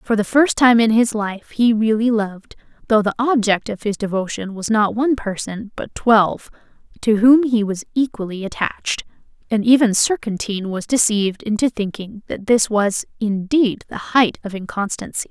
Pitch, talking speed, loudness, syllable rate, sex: 220 Hz, 170 wpm, -18 LUFS, 5.0 syllables/s, female